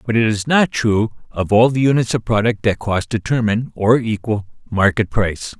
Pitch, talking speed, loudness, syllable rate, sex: 110 Hz, 195 wpm, -17 LUFS, 5.1 syllables/s, male